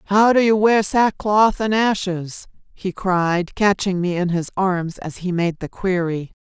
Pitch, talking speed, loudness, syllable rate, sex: 190 Hz, 175 wpm, -19 LUFS, 3.9 syllables/s, female